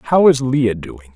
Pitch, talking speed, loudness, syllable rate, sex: 120 Hz, 210 wpm, -15 LUFS, 3.6 syllables/s, male